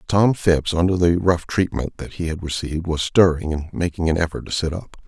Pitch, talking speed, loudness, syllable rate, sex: 85 Hz, 225 wpm, -20 LUFS, 5.5 syllables/s, male